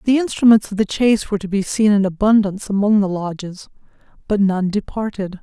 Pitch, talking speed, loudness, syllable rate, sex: 205 Hz, 190 wpm, -17 LUFS, 6.0 syllables/s, female